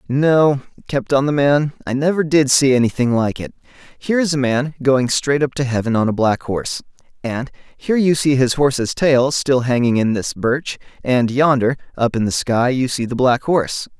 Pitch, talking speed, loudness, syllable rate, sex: 135 Hz, 200 wpm, -17 LUFS, 5.0 syllables/s, male